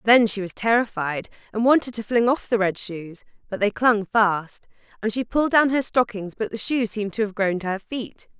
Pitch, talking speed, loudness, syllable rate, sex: 215 Hz, 230 wpm, -22 LUFS, 5.2 syllables/s, female